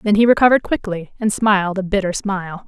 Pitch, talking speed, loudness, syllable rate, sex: 200 Hz, 200 wpm, -17 LUFS, 6.4 syllables/s, female